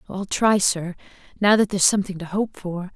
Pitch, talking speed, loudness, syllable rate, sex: 190 Hz, 205 wpm, -21 LUFS, 5.6 syllables/s, female